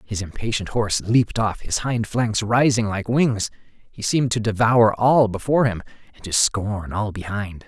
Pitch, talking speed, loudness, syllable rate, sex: 110 Hz, 170 wpm, -21 LUFS, 4.7 syllables/s, male